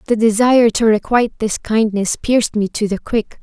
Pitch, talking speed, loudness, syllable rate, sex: 220 Hz, 195 wpm, -16 LUFS, 5.2 syllables/s, female